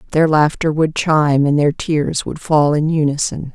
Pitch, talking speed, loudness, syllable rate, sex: 150 Hz, 185 wpm, -16 LUFS, 4.6 syllables/s, female